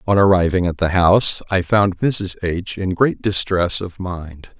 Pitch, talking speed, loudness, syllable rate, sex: 90 Hz, 185 wpm, -17 LUFS, 4.1 syllables/s, male